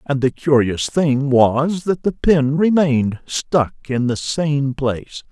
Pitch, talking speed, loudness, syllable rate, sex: 140 Hz, 160 wpm, -18 LUFS, 3.6 syllables/s, male